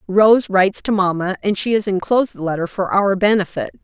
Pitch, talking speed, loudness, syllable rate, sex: 195 Hz, 205 wpm, -17 LUFS, 5.7 syllables/s, female